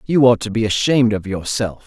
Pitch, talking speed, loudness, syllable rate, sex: 110 Hz, 225 wpm, -17 LUFS, 5.7 syllables/s, male